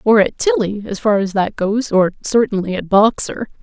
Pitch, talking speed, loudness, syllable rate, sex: 215 Hz, 200 wpm, -16 LUFS, 4.9 syllables/s, female